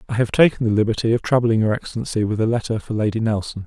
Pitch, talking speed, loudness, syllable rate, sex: 110 Hz, 245 wpm, -20 LUFS, 7.2 syllables/s, male